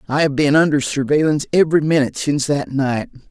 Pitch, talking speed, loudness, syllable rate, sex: 145 Hz, 180 wpm, -17 LUFS, 6.6 syllables/s, male